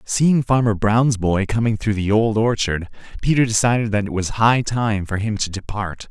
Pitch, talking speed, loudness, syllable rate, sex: 110 Hz, 195 wpm, -19 LUFS, 4.8 syllables/s, male